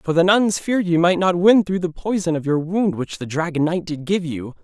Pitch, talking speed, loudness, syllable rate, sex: 175 Hz, 270 wpm, -19 LUFS, 5.3 syllables/s, male